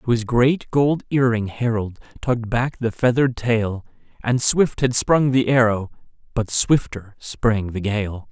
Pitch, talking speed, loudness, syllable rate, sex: 120 Hz, 165 wpm, -20 LUFS, 4.1 syllables/s, male